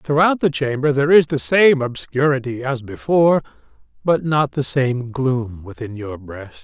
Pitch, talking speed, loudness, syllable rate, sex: 135 Hz, 165 wpm, -18 LUFS, 4.5 syllables/s, male